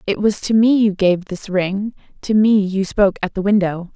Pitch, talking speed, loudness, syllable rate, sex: 200 Hz, 230 wpm, -17 LUFS, 4.8 syllables/s, female